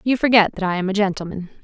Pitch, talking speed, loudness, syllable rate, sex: 200 Hz, 255 wpm, -18 LUFS, 7.0 syllables/s, female